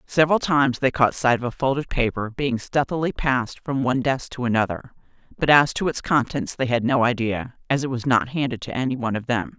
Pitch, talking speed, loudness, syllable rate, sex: 130 Hz, 225 wpm, -22 LUFS, 5.8 syllables/s, female